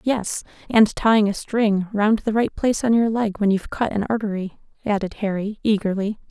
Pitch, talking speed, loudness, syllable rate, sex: 210 Hz, 190 wpm, -21 LUFS, 5.3 syllables/s, female